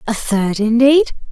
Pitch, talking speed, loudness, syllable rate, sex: 240 Hz, 135 wpm, -14 LUFS, 4.0 syllables/s, female